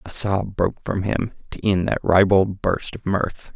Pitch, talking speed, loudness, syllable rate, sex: 95 Hz, 205 wpm, -21 LUFS, 4.3 syllables/s, male